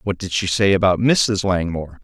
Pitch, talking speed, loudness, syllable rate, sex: 95 Hz, 205 wpm, -18 LUFS, 5.1 syllables/s, male